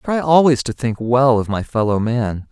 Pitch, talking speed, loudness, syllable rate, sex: 125 Hz, 240 wpm, -17 LUFS, 5.0 syllables/s, male